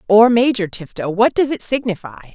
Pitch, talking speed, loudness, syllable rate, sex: 220 Hz, 155 wpm, -16 LUFS, 5.4 syllables/s, female